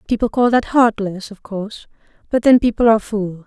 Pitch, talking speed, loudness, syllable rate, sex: 215 Hz, 190 wpm, -16 LUFS, 5.6 syllables/s, female